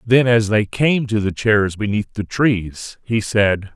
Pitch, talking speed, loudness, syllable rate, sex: 110 Hz, 190 wpm, -18 LUFS, 3.7 syllables/s, male